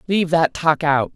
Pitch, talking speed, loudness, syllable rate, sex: 160 Hz, 210 wpm, -18 LUFS, 5.1 syllables/s, female